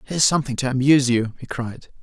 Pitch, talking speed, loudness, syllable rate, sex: 130 Hz, 210 wpm, -20 LUFS, 7.1 syllables/s, male